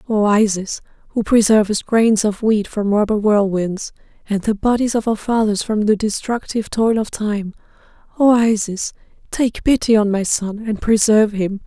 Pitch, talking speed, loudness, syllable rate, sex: 215 Hz, 165 wpm, -17 LUFS, 4.7 syllables/s, female